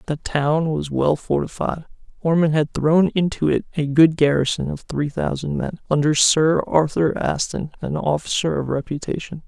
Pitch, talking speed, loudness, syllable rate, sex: 155 Hz, 160 wpm, -20 LUFS, 4.6 syllables/s, male